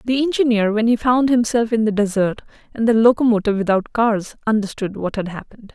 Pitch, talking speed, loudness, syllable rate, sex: 220 Hz, 190 wpm, -18 LUFS, 5.9 syllables/s, female